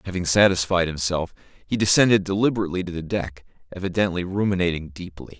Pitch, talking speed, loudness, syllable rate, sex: 90 Hz, 135 wpm, -22 LUFS, 6.2 syllables/s, male